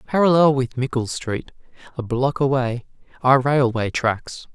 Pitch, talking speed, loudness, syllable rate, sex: 130 Hz, 130 wpm, -20 LUFS, 4.5 syllables/s, male